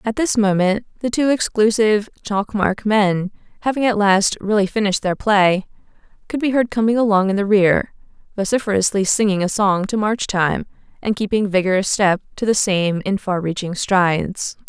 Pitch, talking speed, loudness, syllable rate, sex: 205 Hz, 170 wpm, -18 LUFS, 5.0 syllables/s, female